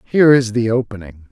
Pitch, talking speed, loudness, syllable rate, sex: 115 Hz, 180 wpm, -15 LUFS, 5.8 syllables/s, male